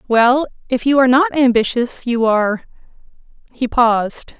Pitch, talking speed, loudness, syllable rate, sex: 250 Hz, 135 wpm, -16 LUFS, 4.9 syllables/s, female